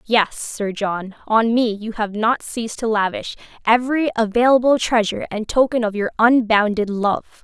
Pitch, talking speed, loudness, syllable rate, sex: 225 Hz, 160 wpm, -19 LUFS, 4.8 syllables/s, female